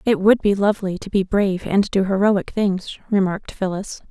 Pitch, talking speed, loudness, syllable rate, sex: 195 Hz, 190 wpm, -20 LUFS, 5.3 syllables/s, female